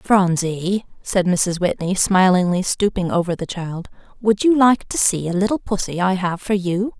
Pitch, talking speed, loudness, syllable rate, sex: 190 Hz, 180 wpm, -19 LUFS, 4.5 syllables/s, female